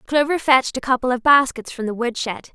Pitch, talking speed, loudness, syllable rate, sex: 260 Hz, 235 wpm, -19 LUFS, 5.8 syllables/s, female